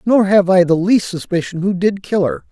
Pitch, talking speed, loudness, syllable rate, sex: 190 Hz, 240 wpm, -15 LUFS, 5.1 syllables/s, male